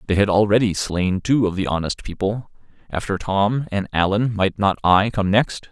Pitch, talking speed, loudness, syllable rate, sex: 100 Hz, 190 wpm, -20 LUFS, 4.8 syllables/s, male